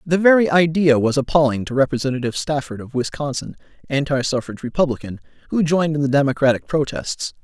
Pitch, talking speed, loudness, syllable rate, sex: 145 Hz, 155 wpm, -19 LUFS, 6.3 syllables/s, male